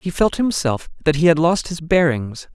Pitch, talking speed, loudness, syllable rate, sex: 160 Hz, 210 wpm, -18 LUFS, 4.8 syllables/s, male